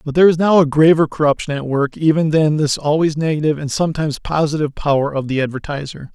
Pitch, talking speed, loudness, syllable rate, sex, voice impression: 150 Hz, 205 wpm, -16 LUFS, 6.6 syllables/s, male, masculine, adult-like, tensed, powerful, clear, slightly fluent, intellectual, calm, wild, lively, slightly strict